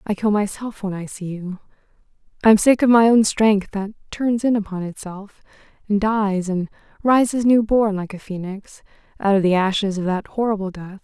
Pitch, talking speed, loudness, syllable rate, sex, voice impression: 205 Hz, 185 wpm, -19 LUFS, 5.0 syllables/s, female, very feminine, slightly young, very adult-like, very thin, slightly relaxed, slightly weak, slightly dark, soft, clear, fluent, very cute, intellectual, refreshing, sincere, very calm, very friendly, very reassuring, very unique, very elegant, wild, sweet, slightly lively, very kind, slightly modest